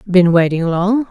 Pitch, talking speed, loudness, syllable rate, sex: 185 Hz, 165 wpm, -14 LUFS, 4.0 syllables/s, female